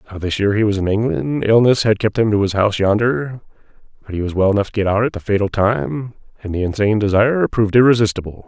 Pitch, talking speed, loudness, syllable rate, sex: 105 Hz, 235 wpm, -17 LUFS, 6.6 syllables/s, male